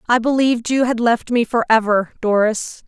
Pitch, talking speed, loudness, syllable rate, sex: 230 Hz, 165 wpm, -17 LUFS, 5.0 syllables/s, female